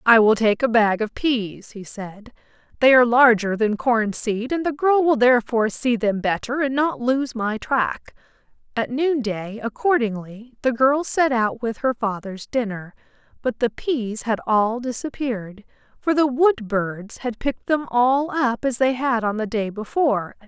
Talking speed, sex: 195 wpm, female